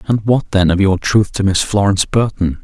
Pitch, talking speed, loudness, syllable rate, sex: 100 Hz, 230 wpm, -14 LUFS, 5.3 syllables/s, male